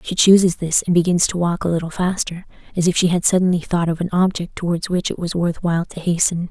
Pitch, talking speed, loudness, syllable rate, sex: 175 Hz, 250 wpm, -18 LUFS, 6.1 syllables/s, female